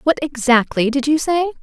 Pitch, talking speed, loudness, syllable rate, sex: 280 Hz, 185 wpm, -17 LUFS, 4.9 syllables/s, female